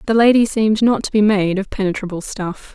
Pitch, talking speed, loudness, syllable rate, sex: 205 Hz, 220 wpm, -17 LUFS, 5.8 syllables/s, female